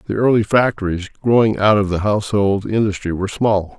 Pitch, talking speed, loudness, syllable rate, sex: 105 Hz, 175 wpm, -17 LUFS, 5.7 syllables/s, male